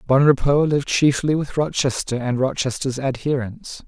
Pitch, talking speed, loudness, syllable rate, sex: 135 Hz, 125 wpm, -20 LUFS, 4.9 syllables/s, male